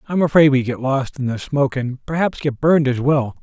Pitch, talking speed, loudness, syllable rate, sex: 140 Hz, 245 wpm, -18 LUFS, 5.6 syllables/s, male